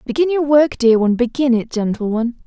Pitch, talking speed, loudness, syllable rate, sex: 250 Hz, 220 wpm, -16 LUFS, 6.2 syllables/s, female